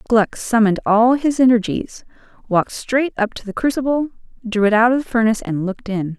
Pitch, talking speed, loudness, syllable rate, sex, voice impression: 230 Hz, 195 wpm, -18 LUFS, 5.9 syllables/s, female, feminine, adult-like, tensed, bright, clear, fluent, intellectual, slightly calm, elegant, lively, slightly strict, slightly sharp